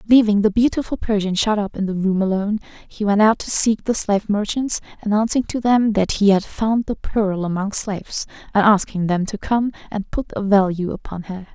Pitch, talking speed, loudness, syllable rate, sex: 205 Hz, 210 wpm, -19 LUFS, 5.3 syllables/s, female